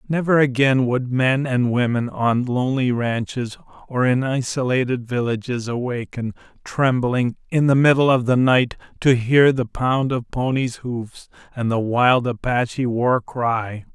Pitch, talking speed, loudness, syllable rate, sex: 125 Hz, 145 wpm, -20 LUFS, 4.2 syllables/s, male